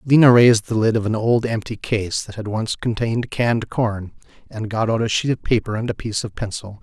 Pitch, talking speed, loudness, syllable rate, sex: 110 Hz, 235 wpm, -20 LUFS, 5.7 syllables/s, male